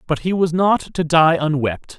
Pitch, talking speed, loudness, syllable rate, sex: 160 Hz, 210 wpm, -17 LUFS, 4.3 syllables/s, male